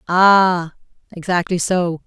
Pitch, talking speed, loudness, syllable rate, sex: 180 Hz, 85 wpm, -16 LUFS, 3.3 syllables/s, female